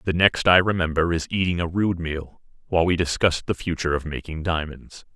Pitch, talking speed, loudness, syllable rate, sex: 85 Hz, 200 wpm, -22 LUFS, 5.8 syllables/s, male